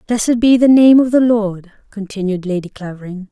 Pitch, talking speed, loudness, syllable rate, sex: 215 Hz, 180 wpm, -13 LUFS, 5.4 syllables/s, female